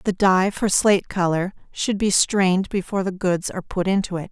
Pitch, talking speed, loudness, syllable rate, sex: 190 Hz, 210 wpm, -21 LUFS, 5.5 syllables/s, female